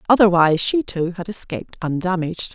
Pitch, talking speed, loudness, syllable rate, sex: 185 Hz, 140 wpm, -20 LUFS, 6.1 syllables/s, female